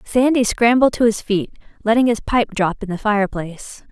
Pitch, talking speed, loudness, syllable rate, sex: 220 Hz, 185 wpm, -18 LUFS, 5.4 syllables/s, female